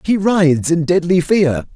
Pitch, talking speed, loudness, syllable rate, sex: 165 Hz, 170 wpm, -15 LUFS, 4.4 syllables/s, male